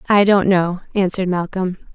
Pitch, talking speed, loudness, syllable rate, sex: 185 Hz, 155 wpm, -18 LUFS, 5.3 syllables/s, female